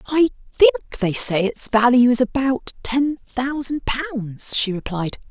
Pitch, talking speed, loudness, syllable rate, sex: 245 Hz, 135 wpm, -19 LUFS, 3.8 syllables/s, female